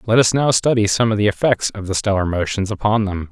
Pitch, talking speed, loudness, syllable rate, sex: 105 Hz, 255 wpm, -18 LUFS, 5.9 syllables/s, male